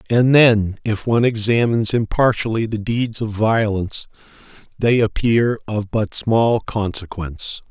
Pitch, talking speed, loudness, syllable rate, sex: 110 Hz, 125 wpm, -18 LUFS, 4.4 syllables/s, male